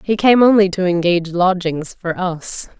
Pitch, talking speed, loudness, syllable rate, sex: 185 Hz, 170 wpm, -16 LUFS, 4.6 syllables/s, female